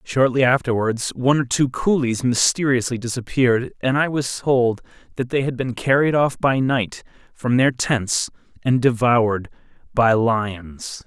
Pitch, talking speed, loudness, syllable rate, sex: 125 Hz, 145 wpm, -20 LUFS, 4.3 syllables/s, male